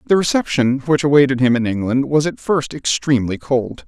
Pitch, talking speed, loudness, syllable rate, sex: 135 Hz, 185 wpm, -17 LUFS, 5.5 syllables/s, male